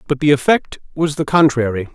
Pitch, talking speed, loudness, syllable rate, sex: 140 Hz, 185 wpm, -16 LUFS, 5.6 syllables/s, male